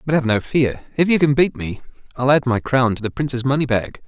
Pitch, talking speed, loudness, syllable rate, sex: 130 Hz, 265 wpm, -19 LUFS, 5.8 syllables/s, male